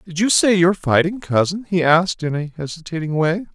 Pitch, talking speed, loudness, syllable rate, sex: 170 Hz, 205 wpm, -18 LUFS, 5.5 syllables/s, male